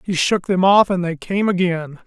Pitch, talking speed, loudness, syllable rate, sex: 180 Hz, 205 wpm, -17 LUFS, 4.8 syllables/s, male